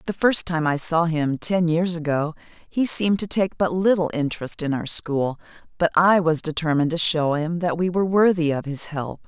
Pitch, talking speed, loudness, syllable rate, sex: 165 Hz, 215 wpm, -21 LUFS, 5.1 syllables/s, female